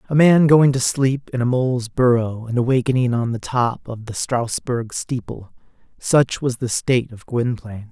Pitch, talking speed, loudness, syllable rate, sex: 125 Hz, 180 wpm, -19 LUFS, 4.6 syllables/s, male